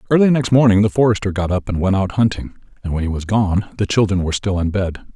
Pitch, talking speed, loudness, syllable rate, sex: 100 Hz, 255 wpm, -17 LUFS, 6.4 syllables/s, male